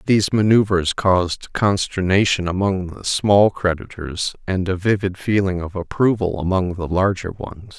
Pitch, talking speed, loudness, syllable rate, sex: 95 Hz, 140 wpm, -19 LUFS, 4.5 syllables/s, male